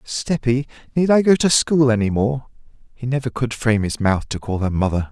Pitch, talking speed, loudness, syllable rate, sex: 125 Hz, 210 wpm, -19 LUFS, 5.3 syllables/s, male